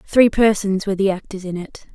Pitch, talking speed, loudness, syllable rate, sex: 200 Hz, 215 wpm, -18 LUFS, 5.9 syllables/s, female